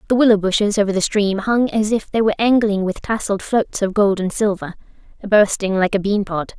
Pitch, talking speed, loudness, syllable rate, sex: 205 Hz, 220 wpm, -18 LUFS, 5.6 syllables/s, female